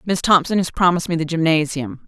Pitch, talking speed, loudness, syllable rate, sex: 170 Hz, 200 wpm, -18 LUFS, 6.1 syllables/s, female